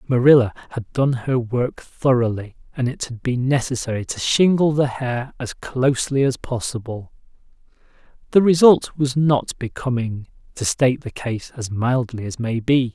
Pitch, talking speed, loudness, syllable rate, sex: 125 Hz, 155 wpm, -20 LUFS, 4.6 syllables/s, male